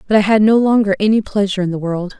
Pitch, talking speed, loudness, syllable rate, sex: 205 Hz, 275 wpm, -15 LUFS, 7.0 syllables/s, female